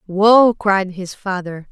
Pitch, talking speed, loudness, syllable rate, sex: 195 Hz, 140 wpm, -15 LUFS, 3.2 syllables/s, female